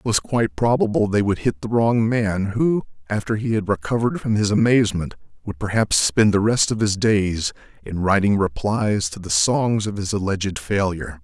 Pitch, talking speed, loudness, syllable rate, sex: 105 Hz, 190 wpm, -20 LUFS, 5.1 syllables/s, male